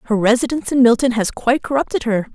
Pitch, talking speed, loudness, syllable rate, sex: 245 Hz, 205 wpm, -17 LUFS, 7.1 syllables/s, female